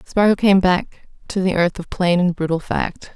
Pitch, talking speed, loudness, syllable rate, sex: 180 Hz, 210 wpm, -18 LUFS, 4.6 syllables/s, female